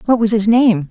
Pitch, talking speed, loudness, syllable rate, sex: 215 Hz, 265 wpm, -13 LUFS, 5.2 syllables/s, male